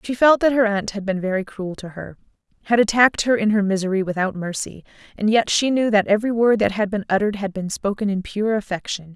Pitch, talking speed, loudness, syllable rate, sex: 205 Hz, 230 wpm, -20 LUFS, 6.1 syllables/s, female